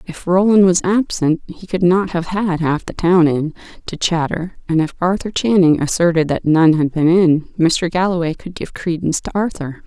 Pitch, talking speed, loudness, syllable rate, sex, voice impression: 175 Hz, 195 wpm, -16 LUFS, 4.8 syllables/s, female, feminine, middle-aged, muffled, very calm, very elegant